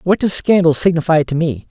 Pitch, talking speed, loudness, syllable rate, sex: 165 Hz, 210 wpm, -15 LUFS, 5.6 syllables/s, male